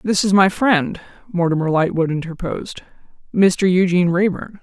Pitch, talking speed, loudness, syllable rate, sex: 180 Hz, 130 wpm, -18 LUFS, 5.1 syllables/s, female